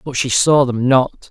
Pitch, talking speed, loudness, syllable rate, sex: 130 Hz, 230 wpm, -15 LUFS, 4.1 syllables/s, male